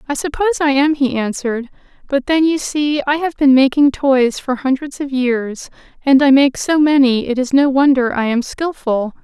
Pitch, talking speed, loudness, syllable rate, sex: 270 Hz, 200 wpm, -15 LUFS, 4.9 syllables/s, female